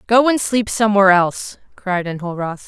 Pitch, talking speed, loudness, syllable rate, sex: 200 Hz, 155 wpm, -16 LUFS, 5.4 syllables/s, female